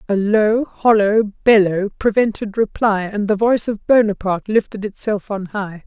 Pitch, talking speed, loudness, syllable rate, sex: 210 Hz, 155 wpm, -17 LUFS, 4.6 syllables/s, female